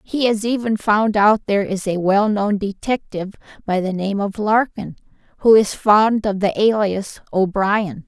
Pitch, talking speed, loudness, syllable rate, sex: 205 Hz, 165 wpm, -18 LUFS, 4.4 syllables/s, female